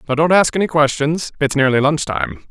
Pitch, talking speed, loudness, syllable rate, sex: 150 Hz, 215 wpm, -16 LUFS, 5.7 syllables/s, male